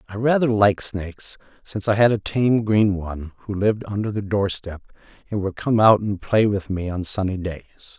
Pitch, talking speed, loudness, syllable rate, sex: 100 Hz, 210 wpm, -21 LUFS, 5.2 syllables/s, male